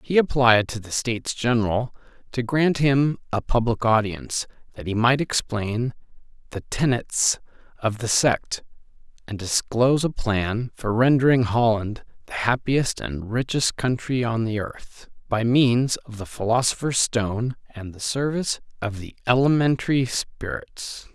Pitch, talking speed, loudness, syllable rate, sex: 120 Hz, 140 wpm, -23 LUFS, 4.4 syllables/s, male